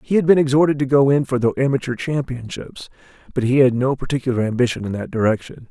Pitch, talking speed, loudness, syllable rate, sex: 130 Hz, 210 wpm, -19 LUFS, 6.4 syllables/s, male